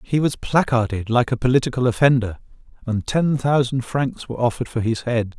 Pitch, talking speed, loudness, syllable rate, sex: 125 Hz, 180 wpm, -20 LUFS, 5.6 syllables/s, male